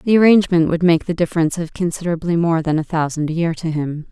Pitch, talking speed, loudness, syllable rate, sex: 170 Hz, 235 wpm, -18 LUFS, 6.7 syllables/s, female